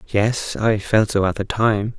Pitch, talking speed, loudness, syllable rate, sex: 105 Hz, 210 wpm, -19 LUFS, 3.8 syllables/s, male